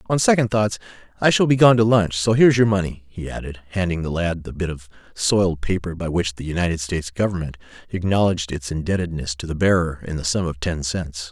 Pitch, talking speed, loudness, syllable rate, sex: 90 Hz, 215 wpm, -21 LUFS, 6.0 syllables/s, male